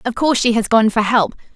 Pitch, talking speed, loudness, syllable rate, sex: 230 Hz, 270 wpm, -16 LUFS, 6.4 syllables/s, female